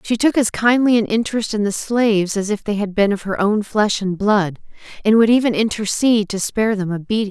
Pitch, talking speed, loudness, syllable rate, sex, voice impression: 210 Hz, 240 wpm, -17 LUFS, 5.7 syllables/s, female, very feminine, young, very thin, tensed, powerful, bright, slightly soft, clear, slightly muffled, halting, cute, slightly cool, intellectual, very refreshing, sincere, very calm, friendly, reassuring, unique, slightly elegant, slightly wild, sweet, lively, kind, slightly modest